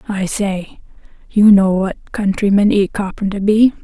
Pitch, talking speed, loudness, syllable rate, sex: 200 Hz, 140 wpm, -15 LUFS, 4.2 syllables/s, female